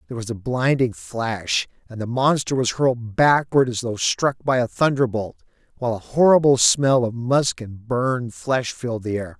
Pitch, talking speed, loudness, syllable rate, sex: 120 Hz, 185 wpm, -20 LUFS, 4.8 syllables/s, male